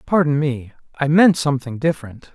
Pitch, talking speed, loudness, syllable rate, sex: 145 Hz, 155 wpm, -18 LUFS, 5.7 syllables/s, male